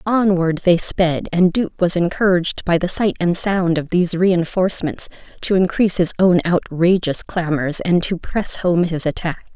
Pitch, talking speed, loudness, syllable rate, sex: 175 Hz, 170 wpm, -18 LUFS, 4.6 syllables/s, female